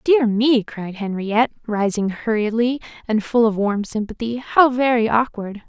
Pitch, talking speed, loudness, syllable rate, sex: 225 Hz, 150 wpm, -19 LUFS, 4.5 syllables/s, female